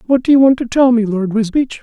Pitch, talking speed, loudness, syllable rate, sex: 240 Hz, 295 wpm, -13 LUFS, 6.0 syllables/s, male